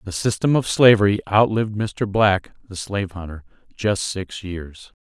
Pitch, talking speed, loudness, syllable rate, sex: 100 Hz, 155 wpm, -20 LUFS, 4.6 syllables/s, male